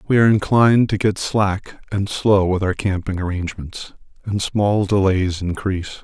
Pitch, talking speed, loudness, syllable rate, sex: 100 Hz, 160 wpm, -19 LUFS, 4.8 syllables/s, male